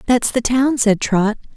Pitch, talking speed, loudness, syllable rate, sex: 235 Hz, 190 wpm, -17 LUFS, 4.1 syllables/s, female